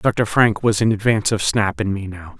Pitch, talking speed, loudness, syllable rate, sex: 105 Hz, 250 wpm, -18 LUFS, 5.1 syllables/s, male